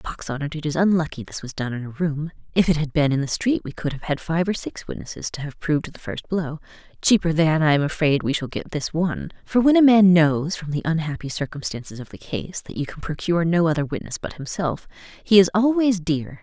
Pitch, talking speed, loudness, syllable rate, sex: 160 Hz, 245 wpm, -22 LUFS, 5.7 syllables/s, female